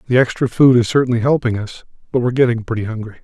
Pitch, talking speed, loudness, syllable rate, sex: 120 Hz, 240 wpm, -16 LUFS, 7.8 syllables/s, male